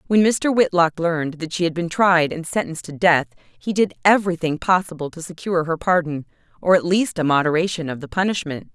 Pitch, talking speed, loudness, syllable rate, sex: 170 Hz, 200 wpm, -20 LUFS, 5.8 syllables/s, female